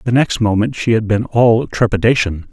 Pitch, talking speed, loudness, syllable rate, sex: 110 Hz, 190 wpm, -15 LUFS, 5.1 syllables/s, male